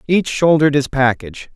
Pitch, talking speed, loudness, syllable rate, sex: 140 Hz, 155 wpm, -15 LUFS, 5.9 syllables/s, male